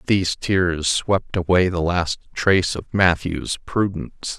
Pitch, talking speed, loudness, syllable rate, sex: 90 Hz, 135 wpm, -20 LUFS, 4.0 syllables/s, male